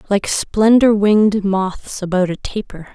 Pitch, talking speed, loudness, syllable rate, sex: 200 Hz, 145 wpm, -16 LUFS, 4.0 syllables/s, female